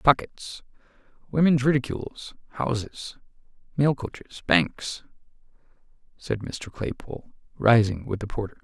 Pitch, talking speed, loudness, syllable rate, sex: 120 Hz, 95 wpm, -25 LUFS, 4.4 syllables/s, male